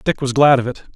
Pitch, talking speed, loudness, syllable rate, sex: 135 Hz, 315 wpm, -15 LUFS, 6.6 syllables/s, male